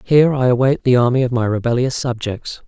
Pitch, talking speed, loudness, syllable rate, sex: 125 Hz, 200 wpm, -16 LUFS, 5.9 syllables/s, male